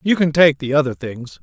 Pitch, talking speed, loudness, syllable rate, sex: 150 Hz, 255 wpm, -16 LUFS, 5.3 syllables/s, male